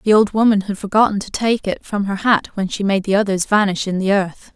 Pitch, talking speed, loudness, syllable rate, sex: 200 Hz, 265 wpm, -17 LUFS, 5.7 syllables/s, female